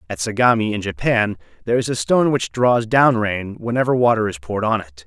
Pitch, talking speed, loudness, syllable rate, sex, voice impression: 110 Hz, 215 wpm, -18 LUFS, 5.9 syllables/s, male, masculine, middle-aged, tensed, powerful, clear, fluent, cool, intellectual, slightly mature, wild, lively, slightly strict, light